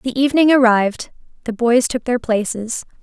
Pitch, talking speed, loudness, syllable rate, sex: 240 Hz, 160 wpm, -16 LUFS, 5.4 syllables/s, female